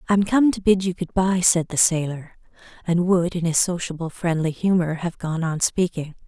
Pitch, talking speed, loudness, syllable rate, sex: 175 Hz, 200 wpm, -21 LUFS, 4.9 syllables/s, female